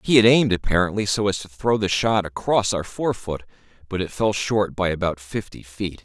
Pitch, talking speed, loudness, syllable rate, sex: 100 Hz, 220 wpm, -22 LUFS, 5.3 syllables/s, male